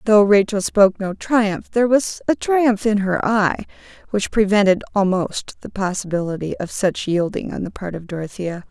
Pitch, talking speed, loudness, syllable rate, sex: 200 Hz, 170 wpm, -19 LUFS, 4.9 syllables/s, female